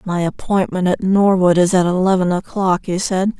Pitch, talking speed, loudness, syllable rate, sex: 185 Hz, 175 wpm, -16 LUFS, 4.9 syllables/s, female